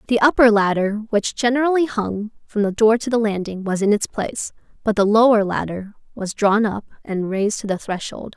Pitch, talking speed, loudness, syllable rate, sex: 215 Hz, 200 wpm, -19 LUFS, 5.4 syllables/s, female